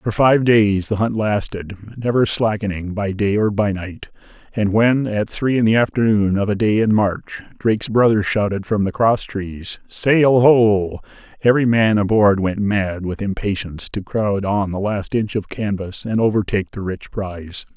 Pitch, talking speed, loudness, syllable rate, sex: 105 Hz, 180 wpm, -18 LUFS, 4.5 syllables/s, male